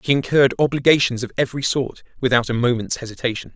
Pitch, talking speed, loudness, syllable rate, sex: 125 Hz, 170 wpm, -19 LUFS, 6.9 syllables/s, male